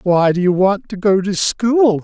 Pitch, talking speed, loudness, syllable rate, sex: 195 Hz, 235 wpm, -15 LUFS, 4.2 syllables/s, male